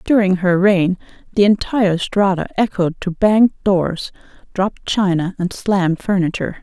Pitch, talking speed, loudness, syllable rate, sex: 190 Hz, 135 wpm, -17 LUFS, 5.0 syllables/s, female